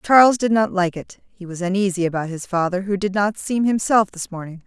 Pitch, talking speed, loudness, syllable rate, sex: 195 Hz, 230 wpm, -20 LUFS, 5.5 syllables/s, female